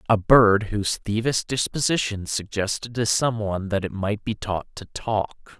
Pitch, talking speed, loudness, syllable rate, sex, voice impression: 105 Hz, 160 wpm, -23 LUFS, 4.5 syllables/s, male, masculine, adult-like, slightly middle-aged, thick, tensed, slightly powerful, very bright, soft, muffled, very fluent, very cool, very intellectual, slightly refreshing, very sincere, calm, mature, very friendly, very reassuring, very unique, very elegant, slightly wild, very sweet, very lively, very kind, slightly modest